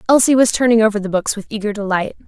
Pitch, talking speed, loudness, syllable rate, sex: 215 Hz, 240 wpm, -16 LUFS, 7.1 syllables/s, female